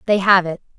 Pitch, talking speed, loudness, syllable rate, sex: 190 Hz, 230 wpm, -15 LUFS, 6.3 syllables/s, female